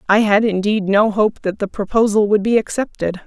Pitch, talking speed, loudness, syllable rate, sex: 210 Hz, 200 wpm, -17 LUFS, 5.2 syllables/s, female